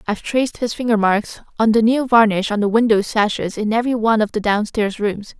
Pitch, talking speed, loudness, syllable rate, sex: 220 Hz, 225 wpm, -17 LUFS, 5.9 syllables/s, female